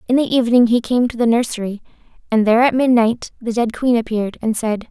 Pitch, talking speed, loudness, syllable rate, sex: 235 Hz, 220 wpm, -17 LUFS, 6.3 syllables/s, female